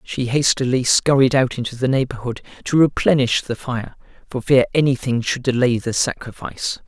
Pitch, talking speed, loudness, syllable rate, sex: 125 Hz, 155 wpm, -19 LUFS, 5.2 syllables/s, male